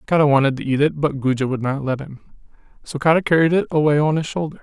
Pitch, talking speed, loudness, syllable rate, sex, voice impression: 145 Hz, 245 wpm, -19 LUFS, 6.8 syllables/s, male, masculine, adult-like, slightly relaxed, slightly weak, soft, muffled, slightly halting, slightly raspy, slightly calm, friendly, kind, modest